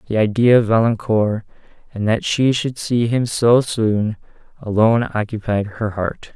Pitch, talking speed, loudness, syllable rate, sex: 110 Hz, 150 wpm, -18 LUFS, 4.4 syllables/s, male